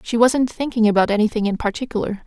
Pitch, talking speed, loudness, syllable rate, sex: 225 Hz, 185 wpm, -19 LUFS, 6.5 syllables/s, female